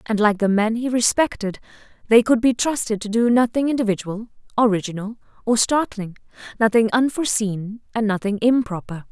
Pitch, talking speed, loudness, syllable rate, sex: 225 Hz, 140 wpm, -20 LUFS, 5.4 syllables/s, female